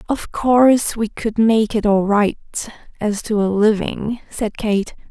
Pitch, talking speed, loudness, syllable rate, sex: 215 Hz, 165 wpm, -18 LUFS, 3.9 syllables/s, female